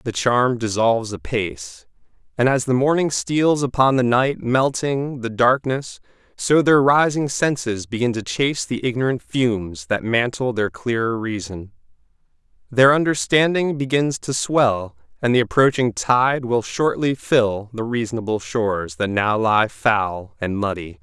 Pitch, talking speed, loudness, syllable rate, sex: 120 Hz, 145 wpm, -20 LUFS, 4.3 syllables/s, male